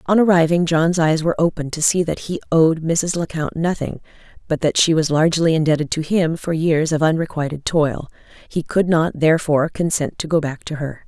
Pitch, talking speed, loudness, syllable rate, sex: 160 Hz, 205 wpm, -18 LUFS, 5.5 syllables/s, female